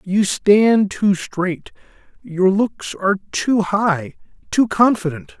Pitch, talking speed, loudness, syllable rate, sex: 190 Hz, 120 wpm, -18 LUFS, 3.3 syllables/s, male